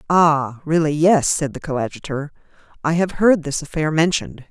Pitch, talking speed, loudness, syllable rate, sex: 155 Hz, 160 wpm, -19 LUFS, 5.1 syllables/s, female